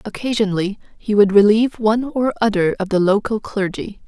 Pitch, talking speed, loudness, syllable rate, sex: 210 Hz, 160 wpm, -17 LUFS, 5.7 syllables/s, female